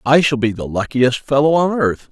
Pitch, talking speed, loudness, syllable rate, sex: 135 Hz, 225 wpm, -16 LUFS, 5.0 syllables/s, male